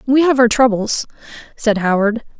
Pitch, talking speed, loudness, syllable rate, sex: 235 Hz, 150 wpm, -15 LUFS, 4.9 syllables/s, female